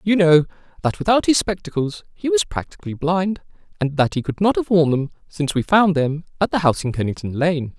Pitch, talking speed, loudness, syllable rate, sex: 165 Hz, 215 wpm, -20 LUFS, 5.8 syllables/s, male